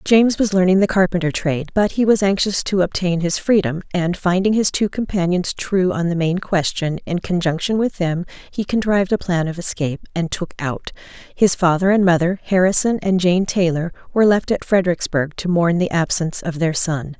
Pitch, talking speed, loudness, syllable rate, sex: 180 Hz, 195 wpm, -18 LUFS, 5.4 syllables/s, female